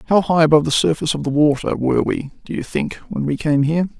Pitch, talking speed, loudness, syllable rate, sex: 155 Hz, 255 wpm, -18 LUFS, 6.4 syllables/s, male